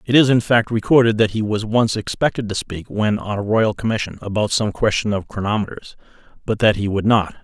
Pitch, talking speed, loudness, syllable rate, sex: 110 Hz, 220 wpm, -19 LUFS, 5.6 syllables/s, male